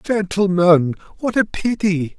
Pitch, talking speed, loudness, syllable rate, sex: 190 Hz, 110 wpm, -18 LUFS, 3.7 syllables/s, male